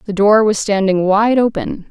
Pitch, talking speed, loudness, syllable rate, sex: 205 Hz, 190 wpm, -14 LUFS, 4.6 syllables/s, female